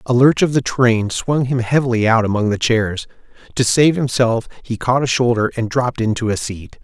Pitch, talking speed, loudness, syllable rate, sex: 120 Hz, 210 wpm, -17 LUFS, 5.1 syllables/s, male